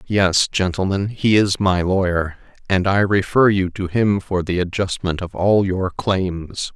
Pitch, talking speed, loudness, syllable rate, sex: 95 Hz, 170 wpm, -19 LUFS, 4.0 syllables/s, male